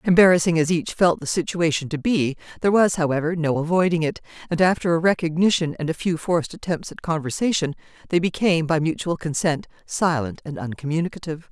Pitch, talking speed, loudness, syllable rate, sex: 165 Hz, 170 wpm, -22 LUFS, 6.2 syllables/s, female